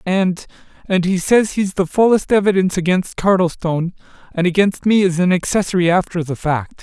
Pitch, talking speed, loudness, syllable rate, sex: 180 Hz, 150 wpm, -17 LUFS, 5.5 syllables/s, male